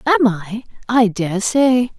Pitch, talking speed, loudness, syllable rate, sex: 230 Hz, 150 wpm, -16 LUFS, 3.1 syllables/s, female